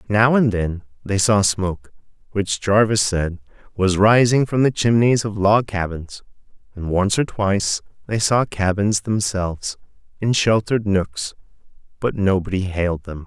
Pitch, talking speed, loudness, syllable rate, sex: 100 Hz, 145 wpm, -19 LUFS, 4.5 syllables/s, male